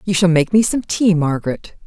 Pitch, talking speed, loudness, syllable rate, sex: 180 Hz, 225 wpm, -16 LUFS, 5.3 syllables/s, female